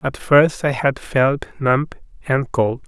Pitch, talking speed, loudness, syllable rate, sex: 135 Hz, 165 wpm, -18 LUFS, 3.7 syllables/s, male